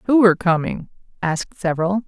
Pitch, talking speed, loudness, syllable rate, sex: 185 Hz, 145 wpm, -19 LUFS, 6.4 syllables/s, female